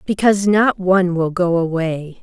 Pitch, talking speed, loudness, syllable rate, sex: 185 Hz, 160 wpm, -16 LUFS, 4.8 syllables/s, female